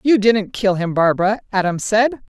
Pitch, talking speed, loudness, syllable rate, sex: 205 Hz, 175 wpm, -17 LUFS, 5.0 syllables/s, female